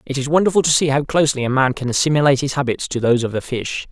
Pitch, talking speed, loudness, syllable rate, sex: 140 Hz, 275 wpm, -17 LUFS, 7.4 syllables/s, male